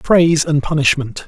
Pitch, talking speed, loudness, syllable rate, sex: 150 Hz, 140 wpm, -15 LUFS, 5.1 syllables/s, male